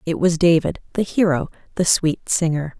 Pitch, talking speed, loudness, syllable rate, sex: 165 Hz, 170 wpm, -19 LUFS, 4.9 syllables/s, female